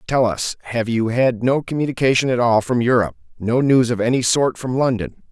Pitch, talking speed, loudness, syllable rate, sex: 120 Hz, 190 wpm, -18 LUFS, 5.6 syllables/s, male